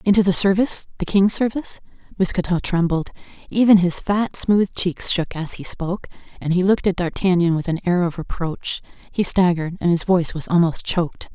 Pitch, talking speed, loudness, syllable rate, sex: 180 Hz, 180 wpm, -20 LUFS, 5.6 syllables/s, female